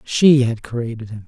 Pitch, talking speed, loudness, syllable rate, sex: 120 Hz, 190 wpm, -17 LUFS, 4.3 syllables/s, male